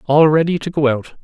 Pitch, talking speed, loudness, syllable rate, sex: 150 Hz, 245 wpm, -15 LUFS, 5.6 syllables/s, male